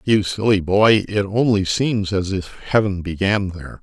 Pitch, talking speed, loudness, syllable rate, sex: 100 Hz, 170 wpm, -19 LUFS, 4.5 syllables/s, male